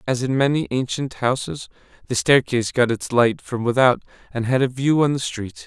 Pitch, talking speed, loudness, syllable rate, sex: 125 Hz, 200 wpm, -20 LUFS, 5.2 syllables/s, male